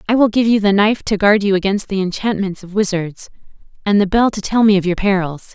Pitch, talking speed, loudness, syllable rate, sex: 200 Hz, 250 wpm, -16 LUFS, 6.0 syllables/s, female